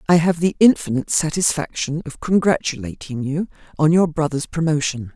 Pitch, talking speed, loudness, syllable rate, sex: 155 Hz, 140 wpm, -19 LUFS, 5.4 syllables/s, female